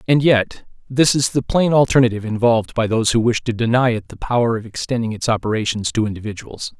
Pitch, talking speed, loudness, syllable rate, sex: 115 Hz, 205 wpm, -18 LUFS, 6.2 syllables/s, male